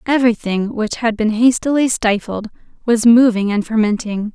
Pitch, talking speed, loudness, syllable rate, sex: 225 Hz, 140 wpm, -16 LUFS, 4.9 syllables/s, female